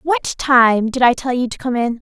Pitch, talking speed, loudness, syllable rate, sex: 255 Hz, 255 wpm, -16 LUFS, 4.7 syllables/s, female